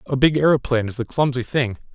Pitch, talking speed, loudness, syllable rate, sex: 130 Hz, 215 wpm, -20 LUFS, 6.6 syllables/s, male